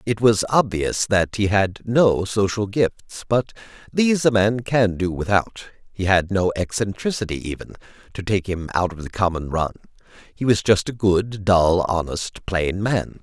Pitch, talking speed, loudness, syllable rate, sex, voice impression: 100 Hz, 170 wpm, -21 LUFS, 4.3 syllables/s, male, very masculine, very adult-like, very middle-aged, tensed, very powerful, slightly dark, slightly soft, muffled, fluent, slightly raspy, very cool, intellectual, sincere, very calm, very mature, very friendly, very reassuring, very unique, very wild, sweet, lively, kind, intense